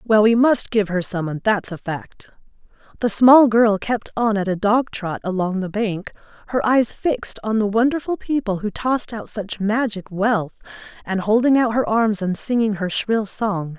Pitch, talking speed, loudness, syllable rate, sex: 210 Hz, 195 wpm, -19 LUFS, 4.6 syllables/s, female